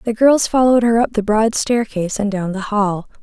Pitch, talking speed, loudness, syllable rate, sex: 220 Hz, 225 wpm, -16 LUFS, 5.3 syllables/s, female